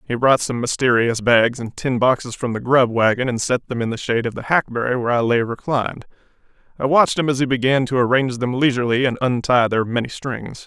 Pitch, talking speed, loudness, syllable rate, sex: 125 Hz, 225 wpm, -19 LUFS, 6.1 syllables/s, male